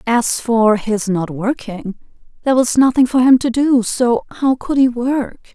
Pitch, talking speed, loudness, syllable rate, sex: 240 Hz, 175 wpm, -15 LUFS, 4.3 syllables/s, female